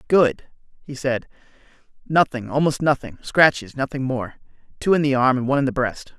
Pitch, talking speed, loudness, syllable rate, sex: 135 Hz, 165 wpm, -21 LUFS, 5.3 syllables/s, male